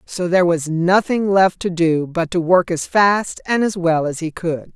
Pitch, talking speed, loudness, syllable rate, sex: 180 Hz, 225 wpm, -17 LUFS, 4.3 syllables/s, female